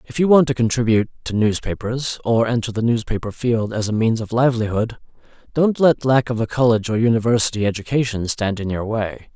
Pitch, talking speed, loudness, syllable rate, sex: 115 Hz, 190 wpm, -19 LUFS, 5.9 syllables/s, male